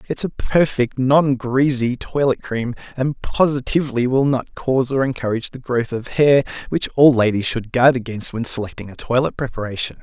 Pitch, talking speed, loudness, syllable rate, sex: 125 Hz, 180 wpm, -19 LUFS, 5.3 syllables/s, male